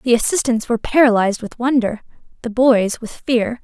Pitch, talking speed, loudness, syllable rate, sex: 235 Hz, 165 wpm, -17 LUFS, 5.5 syllables/s, female